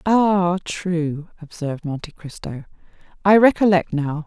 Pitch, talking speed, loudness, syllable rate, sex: 170 Hz, 115 wpm, -19 LUFS, 4.1 syllables/s, female